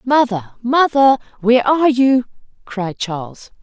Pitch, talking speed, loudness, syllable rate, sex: 240 Hz, 115 wpm, -16 LUFS, 4.4 syllables/s, female